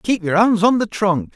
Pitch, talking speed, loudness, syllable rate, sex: 200 Hz, 265 wpm, -17 LUFS, 4.6 syllables/s, male